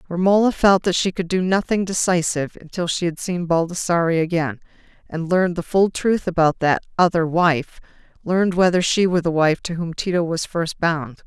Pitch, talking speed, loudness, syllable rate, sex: 175 Hz, 180 wpm, -20 LUFS, 5.4 syllables/s, female